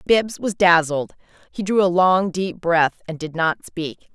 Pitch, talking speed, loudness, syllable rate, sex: 175 Hz, 190 wpm, -20 LUFS, 4.0 syllables/s, female